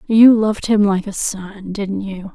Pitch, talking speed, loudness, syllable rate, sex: 200 Hz, 205 wpm, -16 LUFS, 4.2 syllables/s, female